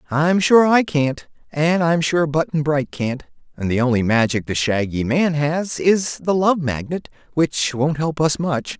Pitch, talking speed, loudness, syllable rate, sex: 150 Hz, 185 wpm, -19 LUFS, 4.1 syllables/s, male